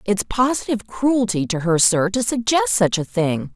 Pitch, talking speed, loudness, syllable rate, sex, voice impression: 215 Hz, 185 wpm, -19 LUFS, 4.7 syllables/s, female, feminine, adult-like, tensed, powerful, clear, fluent, intellectual, calm, elegant, lively, slightly strict